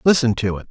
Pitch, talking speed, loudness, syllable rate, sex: 115 Hz, 255 wpm, -19 LUFS, 6.9 syllables/s, male